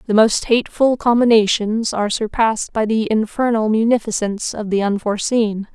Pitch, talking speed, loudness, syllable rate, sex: 220 Hz, 135 wpm, -17 LUFS, 5.4 syllables/s, female